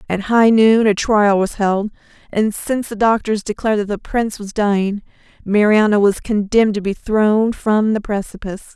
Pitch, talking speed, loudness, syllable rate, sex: 210 Hz, 180 wpm, -16 LUFS, 5.1 syllables/s, female